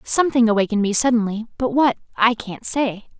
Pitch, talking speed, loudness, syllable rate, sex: 230 Hz, 170 wpm, -19 LUFS, 6.0 syllables/s, female